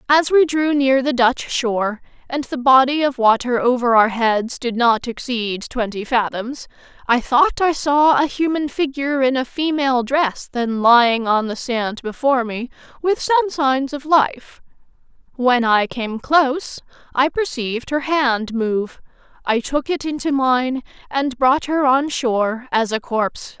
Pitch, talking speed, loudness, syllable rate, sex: 255 Hz, 165 wpm, -18 LUFS, 4.2 syllables/s, female